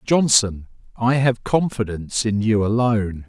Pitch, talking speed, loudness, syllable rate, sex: 115 Hz, 130 wpm, -19 LUFS, 4.5 syllables/s, male